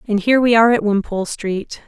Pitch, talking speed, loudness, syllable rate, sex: 215 Hz, 225 wpm, -16 LUFS, 6.5 syllables/s, female